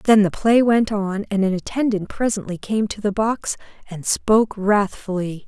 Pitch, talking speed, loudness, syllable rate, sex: 205 Hz, 175 wpm, -20 LUFS, 4.7 syllables/s, female